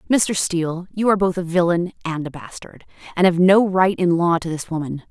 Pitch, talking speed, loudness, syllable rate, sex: 175 Hz, 225 wpm, -19 LUFS, 5.6 syllables/s, female